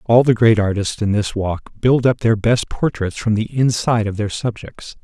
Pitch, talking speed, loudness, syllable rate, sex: 110 Hz, 215 wpm, -18 LUFS, 4.8 syllables/s, male